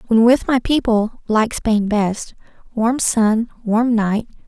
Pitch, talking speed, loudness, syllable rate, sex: 225 Hz, 135 wpm, -17 LUFS, 3.4 syllables/s, female